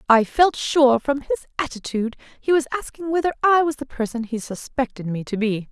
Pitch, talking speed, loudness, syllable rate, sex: 265 Hz, 200 wpm, -22 LUFS, 5.6 syllables/s, female